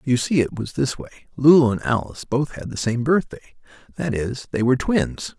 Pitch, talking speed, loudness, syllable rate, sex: 130 Hz, 210 wpm, -21 LUFS, 5.5 syllables/s, male